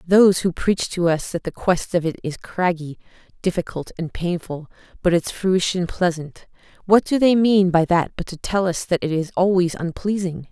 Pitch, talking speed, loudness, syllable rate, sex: 180 Hz, 195 wpm, -20 LUFS, 4.9 syllables/s, female